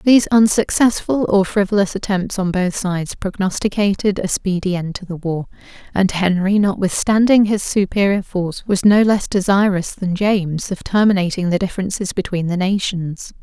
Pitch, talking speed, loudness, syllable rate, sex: 195 Hz, 150 wpm, -17 LUFS, 5.1 syllables/s, female